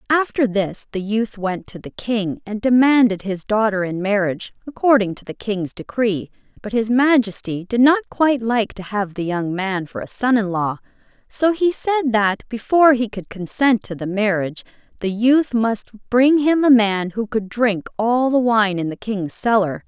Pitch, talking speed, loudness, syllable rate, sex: 220 Hz, 195 wpm, -19 LUFS, 4.6 syllables/s, female